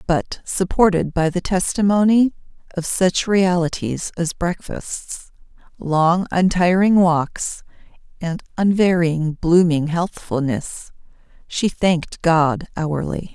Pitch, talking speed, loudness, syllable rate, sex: 175 Hz, 95 wpm, -19 LUFS, 3.5 syllables/s, female